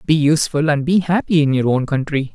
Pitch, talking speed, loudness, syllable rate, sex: 150 Hz, 230 wpm, -17 LUFS, 5.9 syllables/s, male